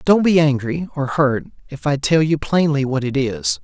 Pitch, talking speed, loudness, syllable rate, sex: 140 Hz, 180 wpm, -18 LUFS, 4.6 syllables/s, male